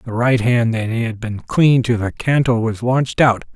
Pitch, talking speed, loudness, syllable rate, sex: 120 Hz, 220 wpm, -17 LUFS, 4.7 syllables/s, male